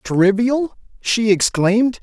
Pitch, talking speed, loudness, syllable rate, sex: 220 Hz, 90 wpm, -17 LUFS, 3.5 syllables/s, male